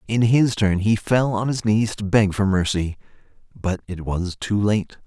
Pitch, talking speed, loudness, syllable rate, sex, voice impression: 105 Hz, 200 wpm, -21 LUFS, 4.3 syllables/s, male, very masculine, very adult-like, very middle-aged, very thick, tensed, very powerful, bright, soft, slightly muffled, fluent, very cool, very intellectual, slightly refreshing, very sincere, very calm, very mature, very friendly, very reassuring, very unique, elegant, very wild, very sweet, lively, very kind, slightly modest